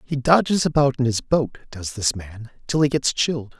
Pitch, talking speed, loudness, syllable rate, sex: 130 Hz, 215 wpm, -21 LUFS, 5.0 syllables/s, male